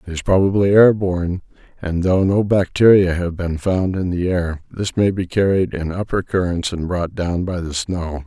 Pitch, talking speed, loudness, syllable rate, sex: 90 Hz, 205 wpm, -18 LUFS, 4.7 syllables/s, male